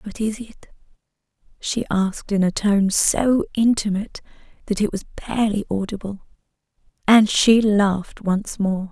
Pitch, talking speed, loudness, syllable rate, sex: 205 Hz, 135 wpm, -20 LUFS, 4.7 syllables/s, female